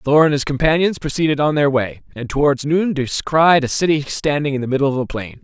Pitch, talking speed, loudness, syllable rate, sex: 145 Hz, 230 wpm, -17 LUFS, 5.8 syllables/s, male